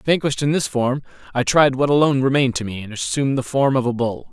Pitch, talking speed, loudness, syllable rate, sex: 130 Hz, 250 wpm, -19 LUFS, 6.6 syllables/s, male